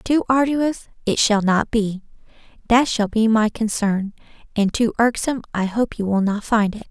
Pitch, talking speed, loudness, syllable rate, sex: 220 Hz, 175 wpm, -20 LUFS, 4.7 syllables/s, female